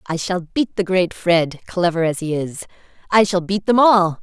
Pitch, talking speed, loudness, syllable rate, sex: 180 Hz, 215 wpm, -18 LUFS, 4.6 syllables/s, female